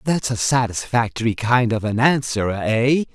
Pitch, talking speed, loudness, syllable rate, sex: 120 Hz, 150 wpm, -19 LUFS, 4.5 syllables/s, male